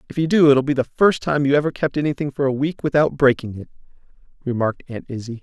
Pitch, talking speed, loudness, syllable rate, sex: 140 Hz, 230 wpm, -19 LUFS, 6.4 syllables/s, male